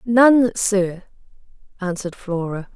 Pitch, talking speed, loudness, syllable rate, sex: 200 Hz, 85 wpm, -19 LUFS, 3.7 syllables/s, female